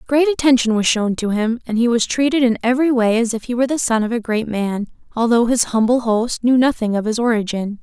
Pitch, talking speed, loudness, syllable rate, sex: 235 Hz, 245 wpm, -17 LUFS, 5.9 syllables/s, female